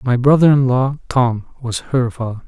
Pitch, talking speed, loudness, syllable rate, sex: 125 Hz, 195 wpm, -16 LUFS, 4.7 syllables/s, male